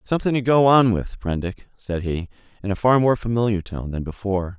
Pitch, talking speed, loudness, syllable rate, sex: 105 Hz, 210 wpm, -21 LUFS, 5.7 syllables/s, male